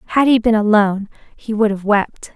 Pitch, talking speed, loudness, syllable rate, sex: 215 Hz, 205 wpm, -15 LUFS, 5.4 syllables/s, female